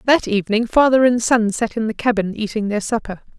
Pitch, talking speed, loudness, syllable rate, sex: 225 Hz, 215 wpm, -18 LUFS, 5.8 syllables/s, female